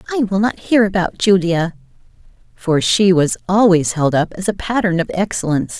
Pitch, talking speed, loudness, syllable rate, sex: 185 Hz, 175 wpm, -16 LUFS, 5.3 syllables/s, female